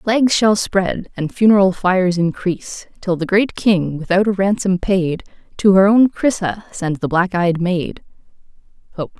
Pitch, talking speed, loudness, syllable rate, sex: 190 Hz, 170 wpm, -16 LUFS, 4.8 syllables/s, female